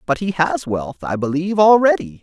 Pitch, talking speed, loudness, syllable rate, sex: 155 Hz, 190 wpm, -17 LUFS, 5.2 syllables/s, male